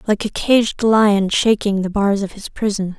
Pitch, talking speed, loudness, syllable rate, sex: 205 Hz, 200 wpm, -17 LUFS, 4.2 syllables/s, female